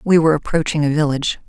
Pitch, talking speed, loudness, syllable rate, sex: 150 Hz, 205 wpm, -17 LUFS, 7.5 syllables/s, female